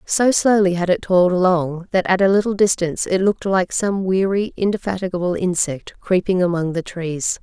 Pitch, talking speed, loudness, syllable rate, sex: 185 Hz, 180 wpm, -18 LUFS, 5.2 syllables/s, female